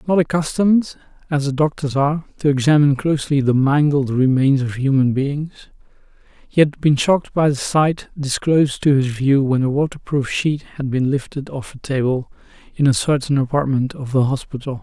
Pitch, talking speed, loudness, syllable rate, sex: 140 Hz, 175 wpm, -18 LUFS, 5.3 syllables/s, male